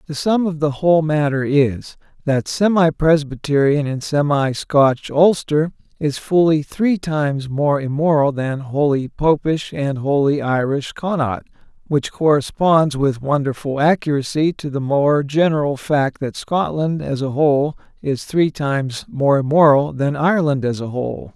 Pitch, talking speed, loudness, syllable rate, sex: 145 Hz, 145 wpm, -18 LUFS, 4.3 syllables/s, male